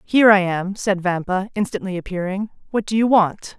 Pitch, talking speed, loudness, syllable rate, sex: 195 Hz, 185 wpm, -19 LUFS, 5.3 syllables/s, female